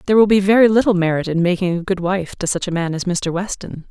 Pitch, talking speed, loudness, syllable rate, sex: 185 Hz, 275 wpm, -17 LUFS, 6.5 syllables/s, female